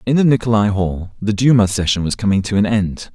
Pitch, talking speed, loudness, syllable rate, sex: 105 Hz, 230 wpm, -16 LUFS, 5.7 syllables/s, male